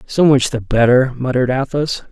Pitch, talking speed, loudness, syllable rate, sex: 130 Hz, 170 wpm, -15 LUFS, 5.2 syllables/s, male